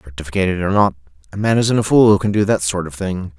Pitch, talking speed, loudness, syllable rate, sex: 95 Hz, 265 wpm, -17 LUFS, 6.6 syllables/s, male